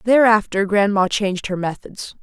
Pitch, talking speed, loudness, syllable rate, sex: 205 Hz, 135 wpm, -18 LUFS, 4.7 syllables/s, female